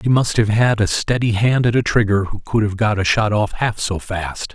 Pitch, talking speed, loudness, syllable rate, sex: 110 Hz, 265 wpm, -18 LUFS, 4.9 syllables/s, male